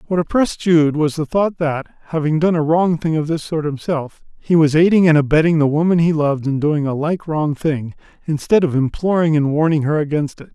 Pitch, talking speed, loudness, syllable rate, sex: 155 Hz, 220 wpm, -17 LUFS, 5.5 syllables/s, male